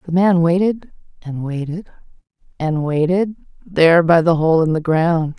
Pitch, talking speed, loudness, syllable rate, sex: 165 Hz, 155 wpm, -16 LUFS, 4.3 syllables/s, female